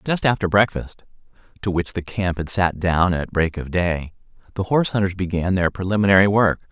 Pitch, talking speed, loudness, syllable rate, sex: 95 Hz, 190 wpm, -20 LUFS, 5.4 syllables/s, male